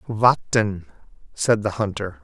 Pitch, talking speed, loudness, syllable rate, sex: 105 Hz, 105 wpm, -21 LUFS, 3.8 syllables/s, male